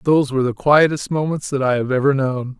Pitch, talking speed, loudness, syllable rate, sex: 140 Hz, 230 wpm, -18 LUFS, 6.1 syllables/s, male